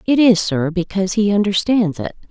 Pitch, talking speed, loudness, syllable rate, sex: 195 Hz, 180 wpm, -16 LUFS, 5.3 syllables/s, female